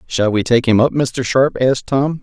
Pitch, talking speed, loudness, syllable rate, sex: 125 Hz, 245 wpm, -15 LUFS, 4.8 syllables/s, male